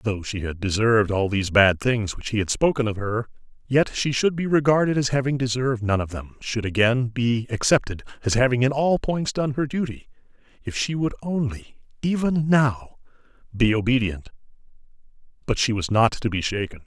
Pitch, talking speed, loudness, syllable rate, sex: 120 Hz, 185 wpm, -22 LUFS, 5.3 syllables/s, male